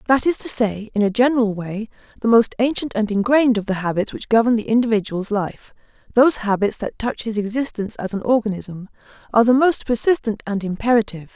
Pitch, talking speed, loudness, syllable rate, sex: 220 Hz, 180 wpm, -19 LUFS, 6.1 syllables/s, female